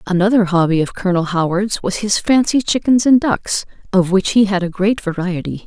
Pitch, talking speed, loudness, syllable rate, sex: 195 Hz, 190 wpm, -16 LUFS, 5.3 syllables/s, female